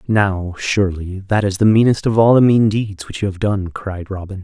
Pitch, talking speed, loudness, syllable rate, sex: 100 Hz, 230 wpm, -16 LUFS, 5.0 syllables/s, male